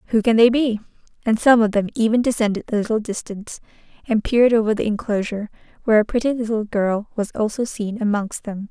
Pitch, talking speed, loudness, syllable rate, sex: 220 Hz, 195 wpm, -20 LUFS, 6.3 syllables/s, female